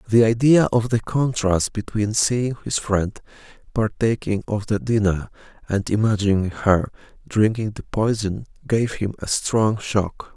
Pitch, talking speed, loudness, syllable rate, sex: 110 Hz, 140 wpm, -21 LUFS, 4.1 syllables/s, male